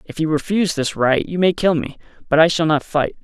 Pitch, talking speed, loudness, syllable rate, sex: 160 Hz, 260 wpm, -18 LUFS, 5.8 syllables/s, male